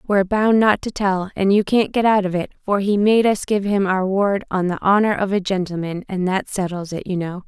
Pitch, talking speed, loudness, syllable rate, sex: 195 Hz, 255 wpm, -19 LUFS, 5.3 syllables/s, female